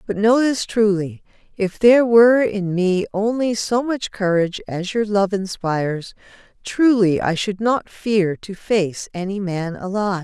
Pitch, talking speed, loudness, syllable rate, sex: 205 Hz, 160 wpm, -19 LUFS, 4.3 syllables/s, female